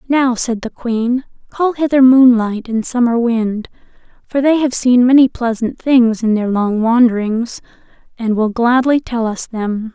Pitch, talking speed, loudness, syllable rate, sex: 240 Hz, 170 wpm, -14 LUFS, 4.2 syllables/s, female